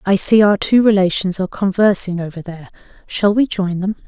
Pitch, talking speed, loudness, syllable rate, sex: 195 Hz, 190 wpm, -15 LUFS, 5.7 syllables/s, female